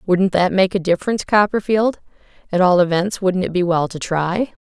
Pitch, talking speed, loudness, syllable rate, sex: 185 Hz, 195 wpm, -18 LUFS, 5.3 syllables/s, female